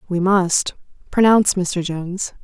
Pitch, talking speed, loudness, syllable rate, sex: 185 Hz, 125 wpm, -18 LUFS, 4.3 syllables/s, female